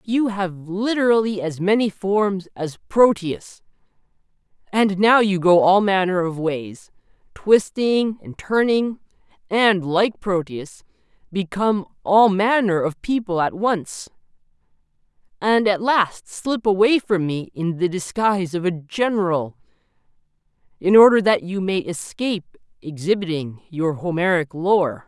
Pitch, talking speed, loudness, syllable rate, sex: 190 Hz, 125 wpm, -20 LUFS, 4.0 syllables/s, male